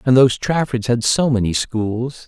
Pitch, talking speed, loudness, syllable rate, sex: 120 Hz, 185 wpm, -18 LUFS, 4.6 syllables/s, male